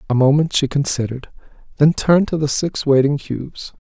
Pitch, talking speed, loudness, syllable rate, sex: 145 Hz, 170 wpm, -17 LUFS, 5.8 syllables/s, male